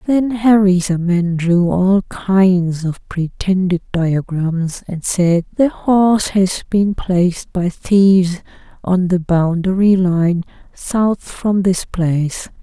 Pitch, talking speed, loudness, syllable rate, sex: 185 Hz, 120 wpm, -16 LUFS, 3.3 syllables/s, female